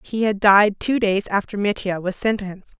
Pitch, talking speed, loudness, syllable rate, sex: 200 Hz, 195 wpm, -19 LUFS, 5.0 syllables/s, female